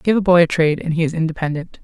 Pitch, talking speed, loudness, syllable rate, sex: 165 Hz, 295 wpm, -17 LUFS, 7.3 syllables/s, female